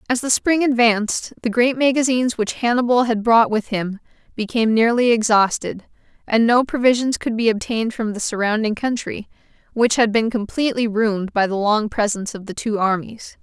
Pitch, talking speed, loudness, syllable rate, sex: 225 Hz, 175 wpm, -19 LUFS, 5.4 syllables/s, female